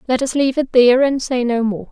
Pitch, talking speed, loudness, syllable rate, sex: 255 Hz, 280 wpm, -16 LUFS, 6.4 syllables/s, female